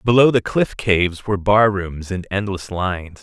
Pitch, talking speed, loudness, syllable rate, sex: 100 Hz, 185 wpm, -19 LUFS, 4.9 syllables/s, male